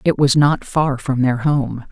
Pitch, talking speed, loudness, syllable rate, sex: 135 Hz, 220 wpm, -17 LUFS, 3.9 syllables/s, female